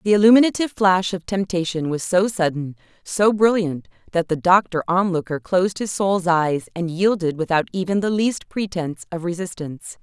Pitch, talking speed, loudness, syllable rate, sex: 180 Hz, 160 wpm, -20 LUFS, 5.2 syllables/s, female